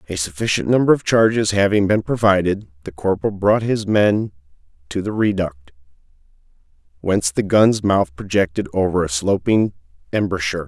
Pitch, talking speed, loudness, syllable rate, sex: 95 Hz, 140 wpm, -18 LUFS, 5.5 syllables/s, male